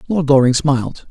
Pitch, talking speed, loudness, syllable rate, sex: 140 Hz, 165 wpm, -15 LUFS, 5.4 syllables/s, male